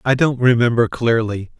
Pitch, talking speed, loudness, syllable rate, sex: 120 Hz, 150 wpm, -17 LUFS, 4.9 syllables/s, male